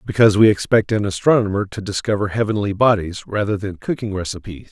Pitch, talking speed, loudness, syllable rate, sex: 100 Hz, 165 wpm, -18 LUFS, 6.2 syllables/s, male